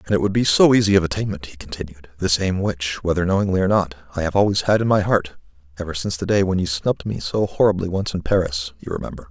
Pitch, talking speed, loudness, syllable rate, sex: 90 Hz, 245 wpm, -20 LUFS, 6.6 syllables/s, male